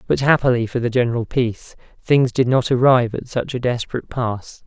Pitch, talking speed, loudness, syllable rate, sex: 125 Hz, 195 wpm, -19 LUFS, 5.8 syllables/s, male